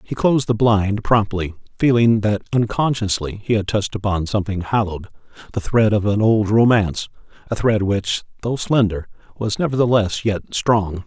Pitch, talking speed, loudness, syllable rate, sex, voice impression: 105 Hz, 155 wpm, -19 LUFS, 5.2 syllables/s, male, masculine, adult-like, slightly relaxed, powerful, clear, slightly raspy, cool, intellectual, mature, friendly, wild, lively, slightly kind